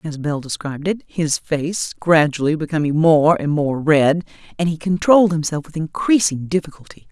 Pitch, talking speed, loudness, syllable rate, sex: 160 Hz, 160 wpm, -18 LUFS, 5.2 syllables/s, female